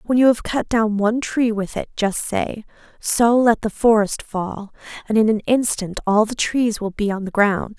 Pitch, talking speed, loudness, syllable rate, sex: 220 Hz, 215 wpm, -19 LUFS, 4.6 syllables/s, female